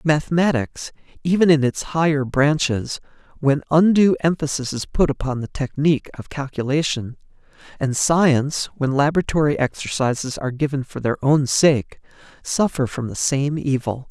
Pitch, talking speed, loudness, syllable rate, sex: 145 Hz, 135 wpm, -20 LUFS, 4.9 syllables/s, male